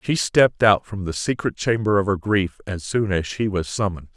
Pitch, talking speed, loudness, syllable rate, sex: 100 Hz, 230 wpm, -21 LUFS, 5.3 syllables/s, male